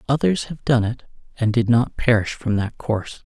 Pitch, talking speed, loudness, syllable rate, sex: 120 Hz, 200 wpm, -21 LUFS, 5.1 syllables/s, male